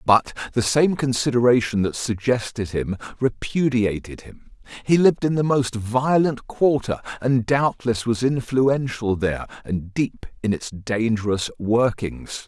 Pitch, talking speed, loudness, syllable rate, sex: 120 Hz, 130 wpm, -22 LUFS, 4.2 syllables/s, male